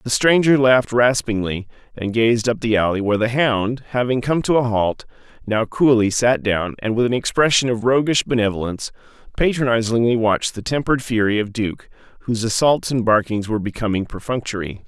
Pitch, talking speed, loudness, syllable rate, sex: 115 Hz, 170 wpm, -19 LUFS, 5.6 syllables/s, male